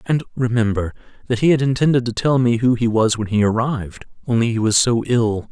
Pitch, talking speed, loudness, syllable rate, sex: 120 Hz, 215 wpm, -18 LUFS, 5.7 syllables/s, male